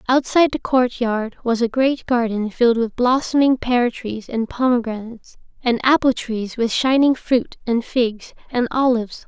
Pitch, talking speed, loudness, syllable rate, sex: 240 Hz, 155 wpm, -19 LUFS, 4.6 syllables/s, female